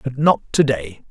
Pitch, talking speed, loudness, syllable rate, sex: 125 Hz, 215 wpm, -18 LUFS, 3.9 syllables/s, male